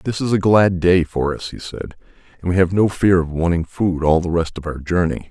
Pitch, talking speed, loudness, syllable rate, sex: 90 Hz, 260 wpm, -18 LUFS, 5.2 syllables/s, male